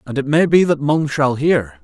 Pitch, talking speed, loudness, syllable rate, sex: 140 Hz, 260 wpm, -16 LUFS, 4.7 syllables/s, male